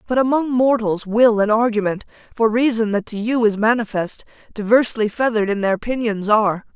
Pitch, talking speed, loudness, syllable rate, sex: 225 Hz, 170 wpm, -18 LUFS, 5.6 syllables/s, female